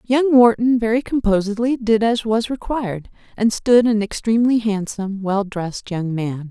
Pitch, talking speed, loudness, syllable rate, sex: 220 Hz, 155 wpm, -18 LUFS, 4.9 syllables/s, female